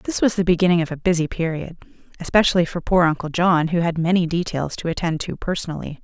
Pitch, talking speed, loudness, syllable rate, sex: 170 Hz, 210 wpm, -20 LUFS, 6.3 syllables/s, female